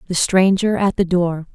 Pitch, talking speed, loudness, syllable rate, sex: 185 Hz, 195 wpm, -17 LUFS, 4.6 syllables/s, female